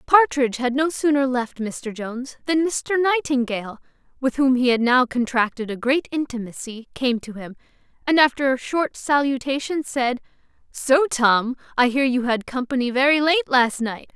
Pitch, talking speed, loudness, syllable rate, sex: 260 Hz, 165 wpm, -21 LUFS, 5.0 syllables/s, female